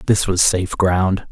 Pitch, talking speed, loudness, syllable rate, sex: 95 Hz, 180 wpm, -17 LUFS, 4.0 syllables/s, male